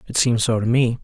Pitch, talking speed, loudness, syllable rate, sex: 120 Hz, 290 wpm, -19 LUFS, 5.8 syllables/s, male